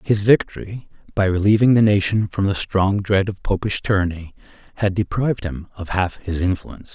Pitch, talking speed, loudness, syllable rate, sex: 100 Hz, 175 wpm, -19 LUFS, 5.3 syllables/s, male